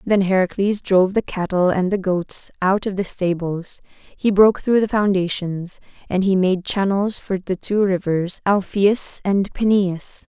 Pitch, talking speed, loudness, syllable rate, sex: 190 Hz, 160 wpm, -19 LUFS, 4.2 syllables/s, female